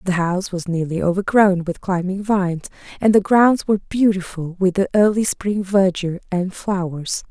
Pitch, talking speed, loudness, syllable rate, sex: 190 Hz, 165 wpm, -19 LUFS, 5.0 syllables/s, female